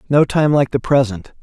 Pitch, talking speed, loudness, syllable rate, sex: 130 Hz, 210 wpm, -16 LUFS, 5.1 syllables/s, male